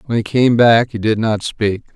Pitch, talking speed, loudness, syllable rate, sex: 115 Hz, 245 wpm, -15 LUFS, 4.7 syllables/s, male